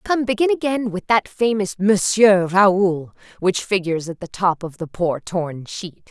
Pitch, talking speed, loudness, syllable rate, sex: 190 Hz, 175 wpm, -19 LUFS, 4.2 syllables/s, female